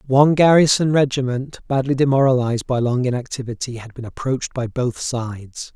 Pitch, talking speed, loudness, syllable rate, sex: 130 Hz, 145 wpm, -19 LUFS, 5.6 syllables/s, male